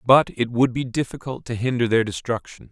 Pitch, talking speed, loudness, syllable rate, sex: 120 Hz, 200 wpm, -22 LUFS, 5.5 syllables/s, male